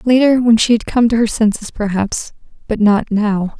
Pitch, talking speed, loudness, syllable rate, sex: 220 Hz, 185 wpm, -15 LUFS, 4.9 syllables/s, female